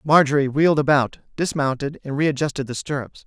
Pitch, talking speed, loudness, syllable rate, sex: 145 Hz, 145 wpm, -21 LUFS, 5.7 syllables/s, male